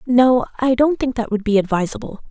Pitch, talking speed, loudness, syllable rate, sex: 240 Hz, 210 wpm, -18 LUFS, 5.4 syllables/s, female